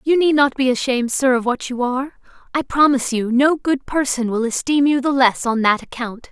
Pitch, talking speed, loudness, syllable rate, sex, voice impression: 260 Hz, 230 wpm, -18 LUFS, 5.4 syllables/s, female, gender-neutral, slightly young, tensed, powerful, bright, clear, intellectual, friendly, lively, slightly kind, slightly intense